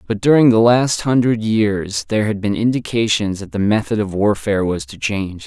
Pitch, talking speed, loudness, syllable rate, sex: 105 Hz, 200 wpm, -17 LUFS, 5.3 syllables/s, male